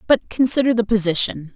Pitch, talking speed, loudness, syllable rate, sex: 215 Hz, 155 wpm, -17 LUFS, 5.8 syllables/s, female